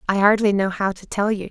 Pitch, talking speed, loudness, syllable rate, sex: 200 Hz, 280 wpm, -20 LUFS, 5.9 syllables/s, female